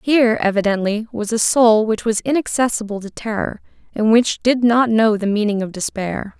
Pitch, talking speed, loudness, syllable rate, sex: 220 Hz, 180 wpm, -17 LUFS, 5.1 syllables/s, female